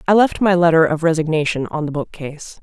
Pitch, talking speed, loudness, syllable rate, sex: 165 Hz, 205 wpm, -17 LUFS, 6.1 syllables/s, female